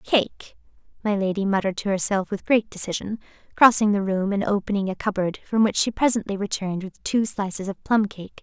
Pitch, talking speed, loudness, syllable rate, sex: 200 Hz, 190 wpm, -23 LUFS, 5.6 syllables/s, female